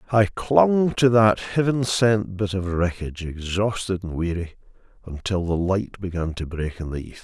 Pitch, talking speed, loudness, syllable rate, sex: 95 Hz, 175 wpm, -22 LUFS, 4.5 syllables/s, male